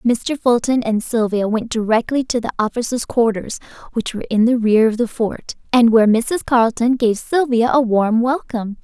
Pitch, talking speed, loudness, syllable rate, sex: 235 Hz, 185 wpm, -17 LUFS, 5.1 syllables/s, female